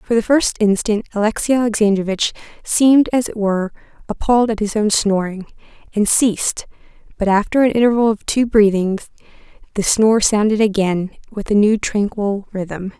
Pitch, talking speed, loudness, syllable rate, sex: 210 Hz, 150 wpm, -16 LUFS, 5.3 syllables/s, female